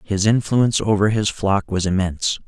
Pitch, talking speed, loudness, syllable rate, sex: 100 Hz, 170 wpm, -19 LUFS, 5.2 syllables/s, male